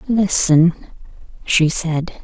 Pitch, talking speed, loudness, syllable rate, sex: 170 Hz, 80 wpm, -15 LUFS, 2.9 syllables/s, female